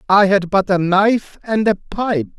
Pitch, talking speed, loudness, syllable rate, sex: 200 Hz, 200 wpm, -16 LUFS, 4.6 syllables/s, male